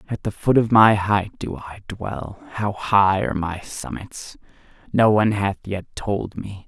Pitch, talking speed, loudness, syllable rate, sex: 100 Hz, 180 wpm, -21 LUFS, 4.1 syllables/s, male